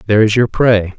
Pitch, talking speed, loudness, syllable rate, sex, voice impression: 110 Hz, 245 wpm, -13 LUFS, 6.3 syllables/s, male, masculine, adult-like, slightly thick, cool, sincere, calm, slightly kind